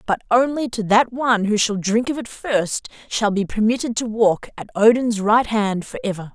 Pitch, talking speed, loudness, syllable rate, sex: 220 Hz, 200 wpm, -19 LUFS, 4.8 syllables/s, female